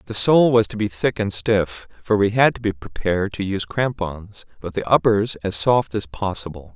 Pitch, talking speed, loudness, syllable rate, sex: 105 Hz, 215 wpm, -20 LUFS, 5.0 syllables/s, male